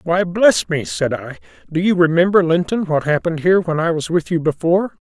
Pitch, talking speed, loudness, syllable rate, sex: 170 Hz, 200 wpm, -17 LUFS, 5.7 syllables/s, male